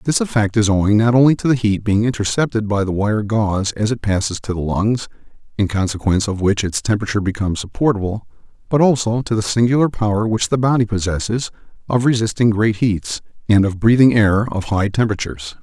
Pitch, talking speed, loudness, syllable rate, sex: 110 Hz, 190 wpm, -17 LUFS, 6.1 syllables/s, male